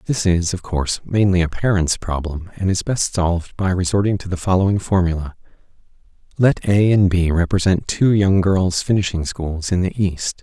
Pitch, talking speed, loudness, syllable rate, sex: 90 Hz, 180 wpm, -18 LUFS, 5.1 syllables/s, male